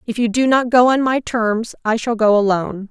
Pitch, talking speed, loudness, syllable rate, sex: 230 Hz, 250 wpm, -16 LUFS, 5.2 syllables/s, female